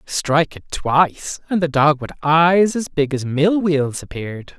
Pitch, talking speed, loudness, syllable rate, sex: 155 Hz, 185 wpm, -18 LUFS, 4.3 syllables/s, male